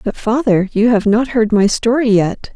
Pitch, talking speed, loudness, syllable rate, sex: 220 Hz, 210 wpm, -14 LUFS, 4.6 syllables/s, female